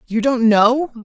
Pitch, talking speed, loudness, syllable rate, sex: 240 Hz, 175 wpm, -15 LUFS, 3.8 syllables/s, female